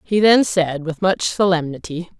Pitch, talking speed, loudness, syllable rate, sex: 175 Hz, 165 wpm, -18 LUFS, 4.5 syllables/s, female